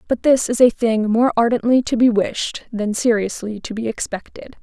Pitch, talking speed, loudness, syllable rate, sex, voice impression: 230 Hz, 195 wpm, -18 LUFS, 5.0 syllables/s, female, feminine, adult-like, slightly relaxed, powerful, soft, fluent, intellectual, calm, friendly, reassuring, kind, modest